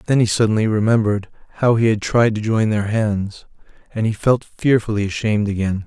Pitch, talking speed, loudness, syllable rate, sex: 110 Hz, 185 wpm, -18 LUFS, 5.6 syllables/s, male